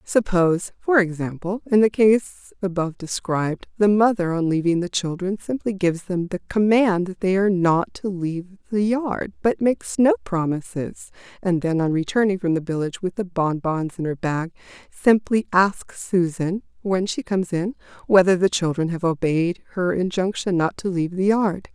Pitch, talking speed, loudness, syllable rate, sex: 185 Hz, 175 wpm, -21 LUFS, 5.1 syllables/s, female